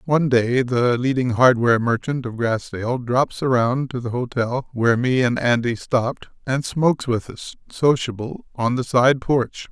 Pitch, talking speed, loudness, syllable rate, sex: 125 Hz, 165 wpm, -20 LUFS, 4.6 syllables/s, male